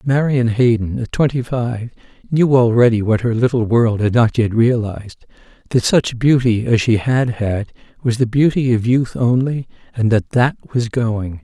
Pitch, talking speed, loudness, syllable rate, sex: 120 Hz, 175 wpm, -16 LUFS, 4.5 syllables/s, male